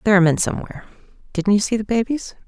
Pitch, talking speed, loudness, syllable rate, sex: 210 Hz, 220 wpm, -20 LUFS, 8.5 syllables/s, female